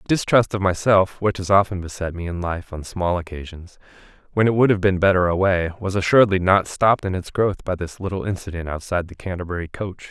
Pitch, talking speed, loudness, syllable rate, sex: 95 Hz, 215 wpm, -20 LUFS, 6.0 syllables/s, male